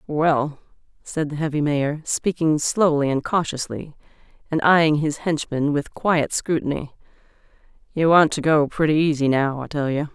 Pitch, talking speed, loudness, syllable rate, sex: 150 Hz, 155 wpm, -21 LUFS, 4.5 syllables/s, female